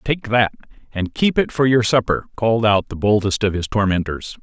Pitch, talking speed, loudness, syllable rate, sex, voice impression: 110 Hz, 205 wpm, -18 LUFS, 5.2 syllables/s, male, very masculine, slightly old, very thick, tensed, slightly weak, bright, soft, clear, fluent, slightly nasal, cool, intellectual, refreshing, very sincere, very calm, very mature, very friendly, reassuring, unique, elegant, wild, sweet, lively, kind, slightly intense